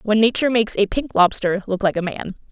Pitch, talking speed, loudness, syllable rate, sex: 210 Hz, 240 wpm, -19 LUFS, 6.1 syllables/s, female